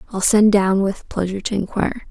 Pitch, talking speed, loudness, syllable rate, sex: 200 Hz, 200 wpm, -18 LUFS, 6.1 syllables/s, female